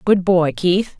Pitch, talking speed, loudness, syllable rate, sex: 180 Hz, 180 wpm, -16 LUFS, 3.5 syllables/s, female